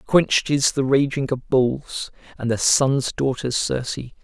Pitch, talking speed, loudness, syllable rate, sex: 130 Hz, 155 wpm, -21 LUFS, 4.0 syllables/s, male